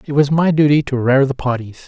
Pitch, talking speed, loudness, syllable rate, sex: 140 Hz, 255 wpm, -15 LUFS, 6.0 syllables/s, male